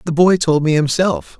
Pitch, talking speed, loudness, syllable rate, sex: 155 Hz, 215 wpm, -15 LUFS, 4.8 syllables/s, male